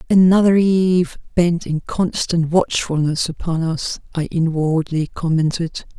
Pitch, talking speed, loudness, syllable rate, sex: 170 Hz, 110 wpm, -18 LUFS, 4.1 syllables/s, female